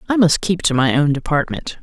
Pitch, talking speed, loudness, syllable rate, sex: 155 Hz, 230 wpm, -17 LUFS, 5.6 syllables/s, female